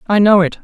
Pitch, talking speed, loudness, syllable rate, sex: 195 Hz, 285 wpm, -12 LUFS, 5.9 syllables/s, female